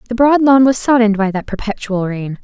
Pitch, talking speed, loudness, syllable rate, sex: 225 Hz, 220 wpm, -14 LUFS, 5.9 syllables/s, female